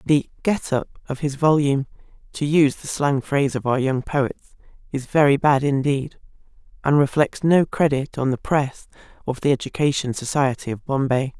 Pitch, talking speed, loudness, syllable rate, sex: 140 Hz, 170 wpm, -21 LUFS, 5.0 syllables/s, female